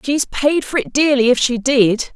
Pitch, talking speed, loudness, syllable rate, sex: 260 Hz, 225 wpm, -15 LUFS, 4.6 syllables/s, female